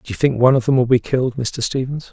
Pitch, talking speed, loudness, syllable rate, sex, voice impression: 125 Hz, 310 wpm, -17 LUFS, 7.0 syllables/s, male, masculine, adult-like, relaxed, weak, muffled, slightly halting, slightly mature, slightly friendly, unique, slightly wild, slightly kind, modest